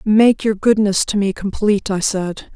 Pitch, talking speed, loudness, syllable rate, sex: 205 Hz, 190 wpm, -17 LUFS, 4.5 syllables/s, female